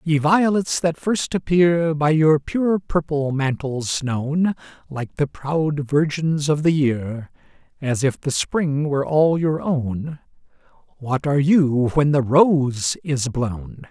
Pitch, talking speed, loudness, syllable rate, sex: 150 Hz, 145 wpm, -20 LUFS, 3.4 syllables/s, male